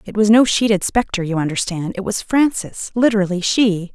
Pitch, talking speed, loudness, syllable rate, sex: 205 Hz, 185 wpm, -17 LUFS, 5.3 syllables/s, female